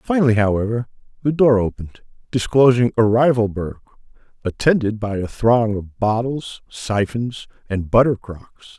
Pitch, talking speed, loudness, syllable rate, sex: 115 Hz, 130 wpm, -19 LUFS, 4.7 syllables/s, male